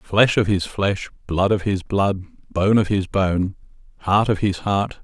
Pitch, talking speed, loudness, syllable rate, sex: 100 Hz, 190 wpm, -20 LUFS, 4.0 syllables/s, male